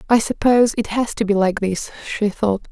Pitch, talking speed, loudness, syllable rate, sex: 210 Hz, 220 wpm, -19 LUFS, 5.5 syllables/s, female